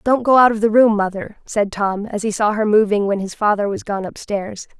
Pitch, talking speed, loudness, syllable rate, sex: 210 Hz, 250 wpm, -17 LUFS, 5.2 syllables/s, female